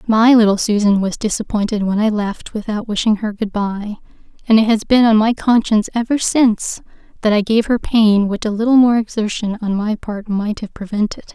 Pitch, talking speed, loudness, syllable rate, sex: 215 Hz, 195 wpm, -16 LUFS, 5.3 syllables/s, female